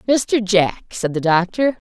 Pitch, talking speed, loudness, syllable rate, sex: 205 Hz, 160 wpm, -18 LUFS, 3.9 syllables/s, female